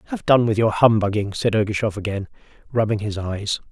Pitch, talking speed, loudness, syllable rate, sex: 105 Hz, 180 wpm, -20 LUFS, 5.7 syllables/s, male